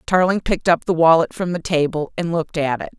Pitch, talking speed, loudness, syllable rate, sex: 165 Hz, 240 wpm, -19 LUFS, 6.2 syllables/s, female